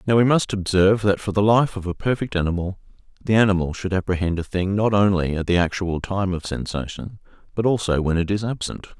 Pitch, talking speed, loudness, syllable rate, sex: 95 Hz, 215 wpm, -21 LUFS, 5.9 syllables/s, male